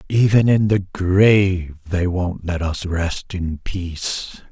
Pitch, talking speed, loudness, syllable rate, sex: 90 Hz, 145 wpm, -19 LUFS, 3.5 syllables/s, male